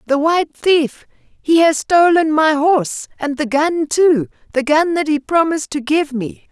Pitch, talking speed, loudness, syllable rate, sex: 300 Hz, 185 wpm, -15 LUFS, 4.3 syllables/s, female